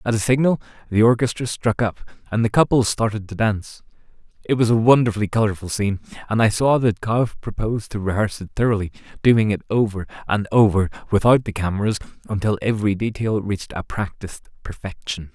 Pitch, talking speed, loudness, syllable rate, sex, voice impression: 110 Hz, 170 wpm, -20 LUFS, 6.1 syllables/s, male, masculine, adult-like, tensed, powerful, bright, clear, cool, intellectual, slightly refreshing, friendly, slightly reassuring, slightly wild, lively, kind